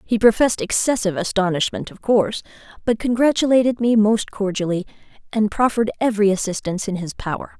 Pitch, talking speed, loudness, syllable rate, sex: 210 Hz, 140 wpm, -19 LUFS, 6.3 syllables/s, female